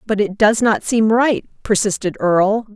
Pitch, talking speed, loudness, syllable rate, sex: 215 Hz, 175 wpm, -16 LUFS, 4.6 syllables/s, female